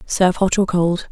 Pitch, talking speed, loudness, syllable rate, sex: 185 Hz, 215 wpm, -17 LUFS, 5.2 syllables/s, female